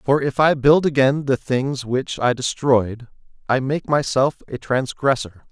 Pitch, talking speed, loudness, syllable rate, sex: 135 Hz, 165 wpm, -19 LUFS, 4.0 syllables/s, male